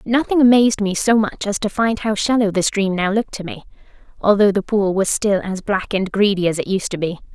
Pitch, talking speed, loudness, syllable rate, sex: 205 Hz, 245 wpm, -18 LUFS, 5.7 syllables/s, female